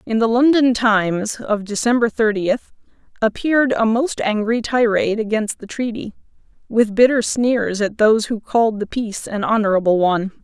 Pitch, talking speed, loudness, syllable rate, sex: 220 Hz, 155 wpm, -18 LUFS, 5.1 syllables/s, female